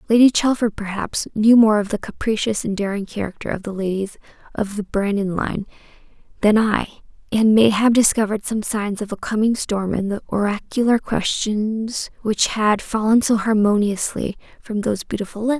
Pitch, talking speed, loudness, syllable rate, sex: 215 Hz, 165 wpm, -20 LUFS, 5.1 syllables/s, female